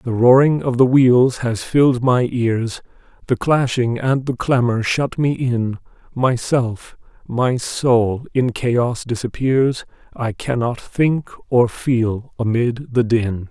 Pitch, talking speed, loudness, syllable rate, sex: 125 Hz, 140 wpm, -18 LUFS, 3.4 syllables/s, male